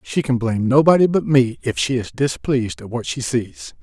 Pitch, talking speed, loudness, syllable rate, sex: 120 Hz, 220 wpm, -19 LUFS, 5.2 syllables/s, male